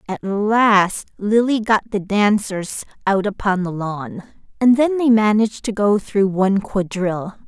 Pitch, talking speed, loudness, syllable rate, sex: 205 Hz, 150 wpm, -18 LUFS, 4.0 syllables/s, female